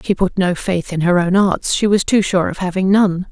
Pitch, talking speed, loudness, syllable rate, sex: 185 Hz, 270 wpm, -16 LUFS, 5.0 syllables/s, female